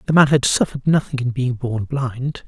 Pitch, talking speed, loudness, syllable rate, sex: 135 Hz, 220 wpm, -19 LUFS, 5.2 syllables/s, male